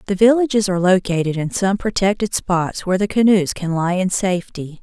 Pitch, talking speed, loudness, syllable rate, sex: 190 Hz, 185 wpm, -18 LUFS, 5.6 syllables/s, female